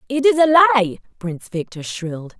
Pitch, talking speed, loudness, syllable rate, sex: 225 Hz, 175 wpm, -17 LUFS, 5.9 syllables/s, female